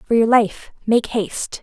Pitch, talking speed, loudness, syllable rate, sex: 220 Hz, 185 wpm, -18 LUFS, 4.3 syllables/s, female